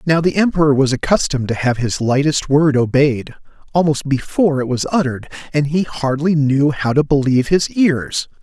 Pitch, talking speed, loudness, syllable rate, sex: 145 Hz, 180 wpm, -16 LUFS, 5.3 syllables/s, male